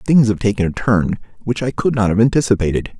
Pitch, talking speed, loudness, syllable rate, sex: 110 Hz, 220 wpm, -17 LUFS, 5.9 syllables/s, male